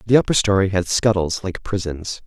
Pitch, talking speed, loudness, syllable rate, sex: 100 Hz, 185 wpm, -20 LUFS, 5.1 syllables/s, male